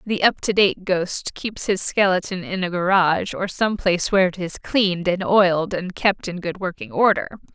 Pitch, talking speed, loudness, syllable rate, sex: 185 Hz, 190 wpm, -20 LUFS, 5.0 syllables/s, female